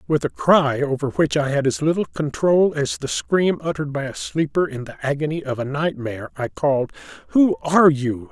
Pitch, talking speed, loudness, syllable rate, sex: 150 Hz, 200 wpm, -20 LUFS, 5.3 syllables/s, male